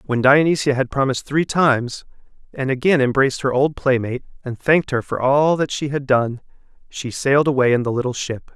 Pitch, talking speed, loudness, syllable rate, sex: 135 Hz, 195 wpm, -18 LUFS, 5.8 syllables/s, male